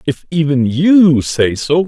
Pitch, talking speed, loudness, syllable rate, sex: 150 Hz, 160 wpm, -13 LUFS, 3.5 syllables/s, male